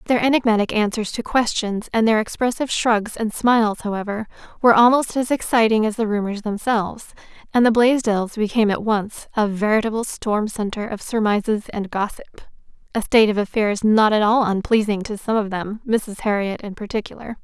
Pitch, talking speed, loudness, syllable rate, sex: 220 Hz, 170 wpm, -20 LUFS, 5.5 syllables/s, female